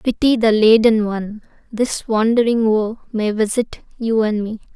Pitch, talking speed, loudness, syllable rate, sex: 220 Hz, 150 wpm, -17 LUFS, 4.5 syllables/s, female